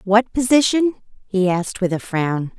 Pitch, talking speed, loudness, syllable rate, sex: 210 Hz, 160 wpm, -19 LUFS, 4.7 syllables/s, female